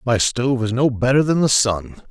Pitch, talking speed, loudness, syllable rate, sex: 120 Hz, 230 wpm, -18 LUFS, 5.1 syllables/s, male